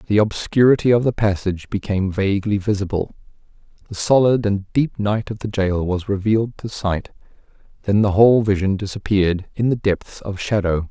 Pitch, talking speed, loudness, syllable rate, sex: 100 Hz, 165 wpm, -19 LUFS, 5.5 syllables/s, male